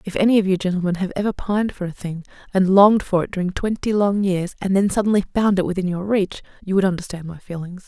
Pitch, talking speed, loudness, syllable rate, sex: 190 Hz, 245 wpm, -20 LUFS, 6.5 syllables/s, female